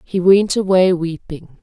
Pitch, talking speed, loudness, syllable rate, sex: 180 Hz, 150 wpm, -15 LUFS, 4.0 syllables/s, female